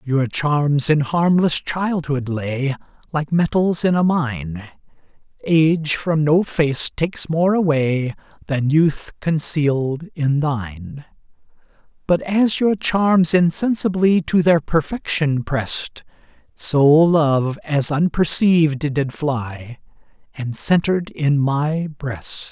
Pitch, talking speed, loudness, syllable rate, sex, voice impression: 155 Hz, 115 wpm, -18 LUFS, 3.2 syllables/s, male, masculine, slightly old, powerful, slightly soft, raspy, mature, friendly, slightly wild, lively, slightly strict